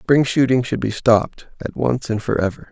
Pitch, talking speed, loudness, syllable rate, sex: 120 Hz, 200 wpm, -18 LUFS, 5.1 syllables/s, male